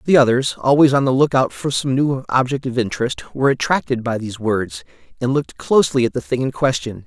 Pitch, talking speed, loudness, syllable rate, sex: 130 Hz, 210 wpm, -18 LUFS, 6.0 syllables/s, male